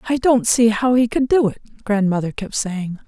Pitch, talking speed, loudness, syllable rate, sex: 225 Hz, 215 wpm, -18 LUFS, 5.0 syllables/s, female